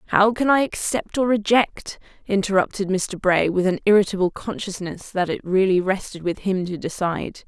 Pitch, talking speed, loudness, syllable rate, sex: 195 Hz, 170 wpm, -21 LUFS, 5.1 syllables/s, female